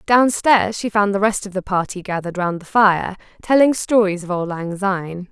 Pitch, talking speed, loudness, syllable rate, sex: 195 Hz, 215 wpm, -18 LUFS, 5.3 syllables/s, female